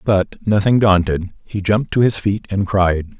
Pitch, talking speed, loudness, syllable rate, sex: 100 Hz, 190 wpm, -17 LUFS, 4.7 syllables/s, male